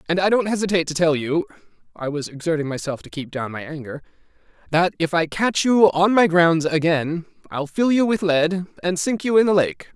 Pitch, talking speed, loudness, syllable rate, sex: 170 Hz, 205 wpm, -20 LUFS, 5.5 syllables/s, male